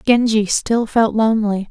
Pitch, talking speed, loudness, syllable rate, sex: 220 Hz, 140 wpm, -16 LUFS, 4.5 syllables/s, female